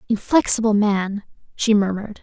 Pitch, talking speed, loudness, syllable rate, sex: 210 Hz, 110 wpm, -19 LUFS, 5.1 syllables/s, female